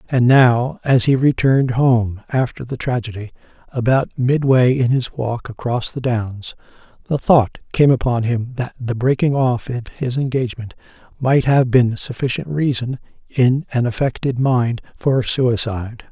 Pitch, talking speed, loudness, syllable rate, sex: 125 Hz, 150 wpm, -18 LUFS, 4.5 syllables/s, male